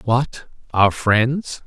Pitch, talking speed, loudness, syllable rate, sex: 120 Hz, 110 wpm, -19 LUFS, 2.2 syllables/s, male